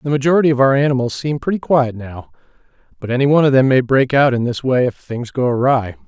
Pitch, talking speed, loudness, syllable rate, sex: 130 Hz, 235 wpm, -16 LUFS, 6.3 syllables/s, male